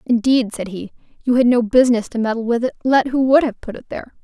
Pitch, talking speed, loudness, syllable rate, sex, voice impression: 240 Hz, 255 wpm, -17 LUFS, 6.3 syllables/s, female, feminine, adult-like, slightly intellectual, slightly strict